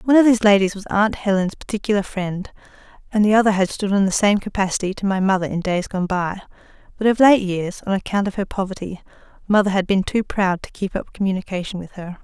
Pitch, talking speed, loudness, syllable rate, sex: 195 Hz, 220 wpm, -20 LUFS, 6.1 syllables/s, female